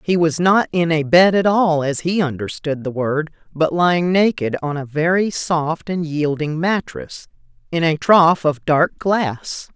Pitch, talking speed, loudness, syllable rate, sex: 165 Hz, 180 wpm, -18 LUFS, 4.1 syllables/s, female